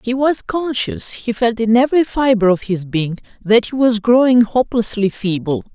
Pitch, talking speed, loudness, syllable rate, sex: 230 Hz, 175 wpm, -16 LUFS, 4.8 syllables/s, female